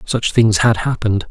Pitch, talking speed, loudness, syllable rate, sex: 110 Hz, 185 wpm, -15 LUFS, 5.1 syllables/s, male